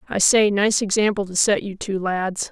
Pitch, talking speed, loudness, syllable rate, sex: 200 Hz, 215 wpm, -19 LUFS, 4.8 syllables/s, female